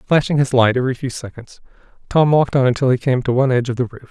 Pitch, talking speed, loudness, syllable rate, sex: 130 Hz, 265 wpm, -17 LUFS, 7.5 syllables/s, male